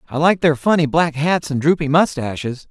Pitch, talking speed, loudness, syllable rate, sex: 150 Hz, 200 wpm, -17 LUFS, 5.2 syllables/s, male